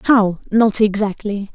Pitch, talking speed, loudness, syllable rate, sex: 205 Hz, 115 wpm, -17 LUFS, 3.9 syllables/s, female